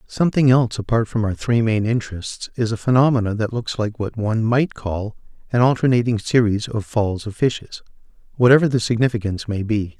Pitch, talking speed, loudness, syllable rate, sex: 115 Hz, 180 wpm, -19 LUFS, 5.7 syllables/s, male